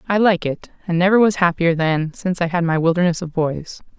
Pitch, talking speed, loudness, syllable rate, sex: 175 Hz, 225 wpm, -18 LUFS, 5.7 syllables/s, female